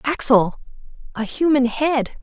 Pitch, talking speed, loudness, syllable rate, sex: 260 Hz, 110 wpm, -19 LUFS, 3.9 syllables/s, female